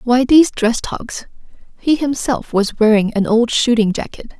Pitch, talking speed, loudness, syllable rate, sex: 240 Hz, 165 wpm, -15 LUFS, 4.5 syllables/s, female